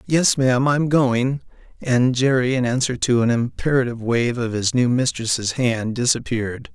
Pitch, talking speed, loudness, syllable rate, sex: 125 Hz, 160 wpm, -20 LUFS, 4.7 syllables/s, male